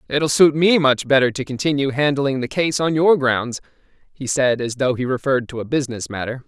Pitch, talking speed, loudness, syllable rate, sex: 135 Hz, 215 wpm, -19 LUFS, 5.6 syllables/s, male